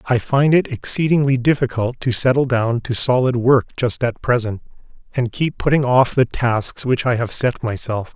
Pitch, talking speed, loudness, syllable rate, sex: 125 Hz, 185 wpm, -18 LUFS, 4.7 syllables/s, male